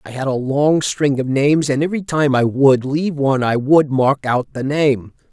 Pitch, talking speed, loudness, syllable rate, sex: 140 Hz, 225 wpm, -16 LUFS, 4.9 syllables/s, male